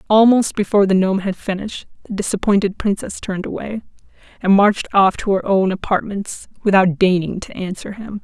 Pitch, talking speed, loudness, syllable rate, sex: 200 Hz, 170 wpm, -18 LUFS, 5.8 syllables/s, female